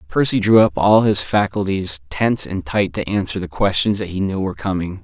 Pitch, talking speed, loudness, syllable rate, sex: 95 Hz, 215 wpm, -18 LUFS, 5.5 syllables/s, male